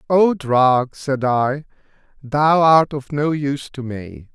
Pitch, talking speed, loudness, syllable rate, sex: 140 Hz, 150 wpm, -18 LUFS, 3.4 syllables/s, male